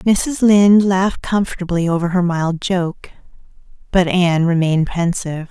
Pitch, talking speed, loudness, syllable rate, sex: 180 Hz, 130 wpm, -16 LUFS, 5.0 syllables/s, female